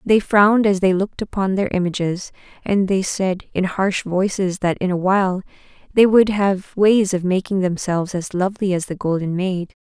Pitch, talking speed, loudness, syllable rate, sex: 190 Hz, 190 wpm, -19 LUFS, 5.0 syllables/s, female